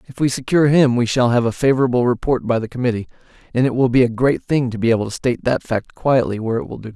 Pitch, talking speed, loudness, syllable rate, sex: 125 Hz, 285 wpm, -18 LUFS, 7.1 syllables/s, male